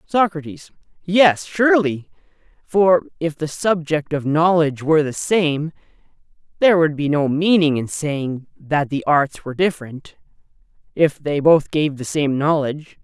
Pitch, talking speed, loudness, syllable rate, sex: 155 Hz, 140 wpm, -18 LUFS, 4.6 syllables/s, male